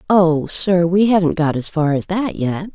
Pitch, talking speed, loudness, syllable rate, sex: 175 Hz, 220 wpm, -17 LUFS, 4.4 syllables/s, female